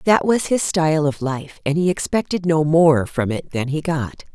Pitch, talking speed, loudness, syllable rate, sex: 160 Hz, 220 wpm, -19 LUFS, 4.6 syllables/s, female